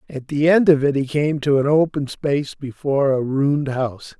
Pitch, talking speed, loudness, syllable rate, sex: 140 Hz, 215 wpm, -19 LUFS, 5.3 syllables/s, male